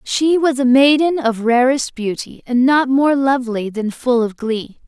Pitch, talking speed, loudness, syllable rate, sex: 255 Hz, 185 wpm, -16 LUFS, 4.3 syllables/s, female